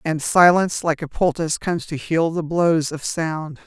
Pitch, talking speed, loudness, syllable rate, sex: 160 Hz, 195 wpm, -20 LUFS, 4.8 syllables/s, female